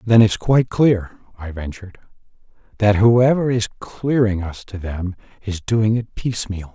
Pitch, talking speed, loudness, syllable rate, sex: 105 Hz, 150 wpm, -19 LUFS, 4.5 syllables/s, male